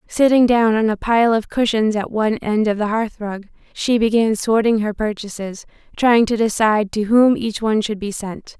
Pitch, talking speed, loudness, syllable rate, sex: 220 Hz, 205 wpm, -18 LUFS, 4.9 syllables/s, female